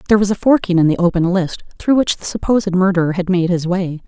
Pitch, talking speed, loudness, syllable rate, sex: 185 Hz, 250 wpm, -16 LUFS, 6.5 syllables/s, female